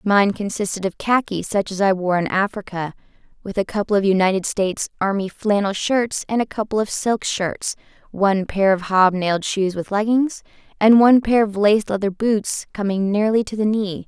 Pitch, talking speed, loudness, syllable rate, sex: 205 Hz, 190 wpm, -19 LUFS, 5.2 syllables/s, female